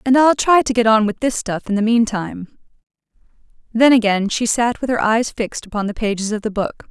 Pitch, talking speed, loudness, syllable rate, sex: 225 Hz, 225 wpm, -17 LUFS, 5.7 syllables/s, female